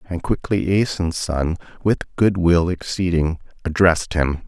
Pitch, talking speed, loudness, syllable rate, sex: 90 Hz, 135 wpm, -20 LUFS, 4.2 syllables/s, male